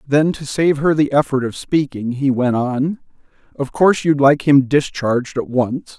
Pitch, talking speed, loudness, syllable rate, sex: 140 Hz, 190 wpm, -17 LUFS, 4.5 syllables/s, male